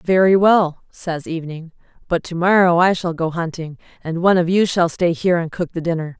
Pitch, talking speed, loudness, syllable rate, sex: 170 Hz, 215 wpm, -18 LUFS, 5.5 syllables/s, female